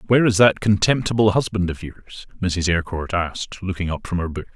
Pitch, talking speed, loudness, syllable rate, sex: 95 Hz, 195 wpm, -20 LUFS, 5.8 syllables/s, male